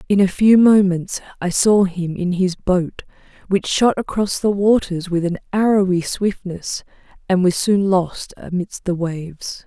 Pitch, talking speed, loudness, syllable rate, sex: 190 Hz, 160 wpm, -18 LUFS, 4.1 syllables/s, female